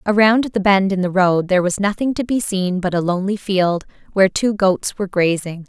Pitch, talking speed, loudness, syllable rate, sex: 195 Hz, 220 wpm, -18 LUFS, 5.5 syllables/s, female